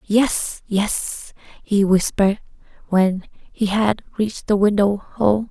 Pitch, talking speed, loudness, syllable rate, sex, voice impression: 205 Hz, 120 wpm, -19 LUFS, 3.4 syllables/s, female, feminine, slightly young, slightly adult-like, thin, tensed, powerful, bright, slightly hard, clear, slightly halting, slightly cute, slightly cool, very intellectual, slightly refreshing, sincere, very calm, slightly friendly, slightly reassuring, elegant, slightly sweet, slightly lively, slightly kind, slightly modest